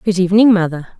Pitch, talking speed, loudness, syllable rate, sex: 190 Hz, 180 wpm, -13 LUFS, 7.4 syllables/s, female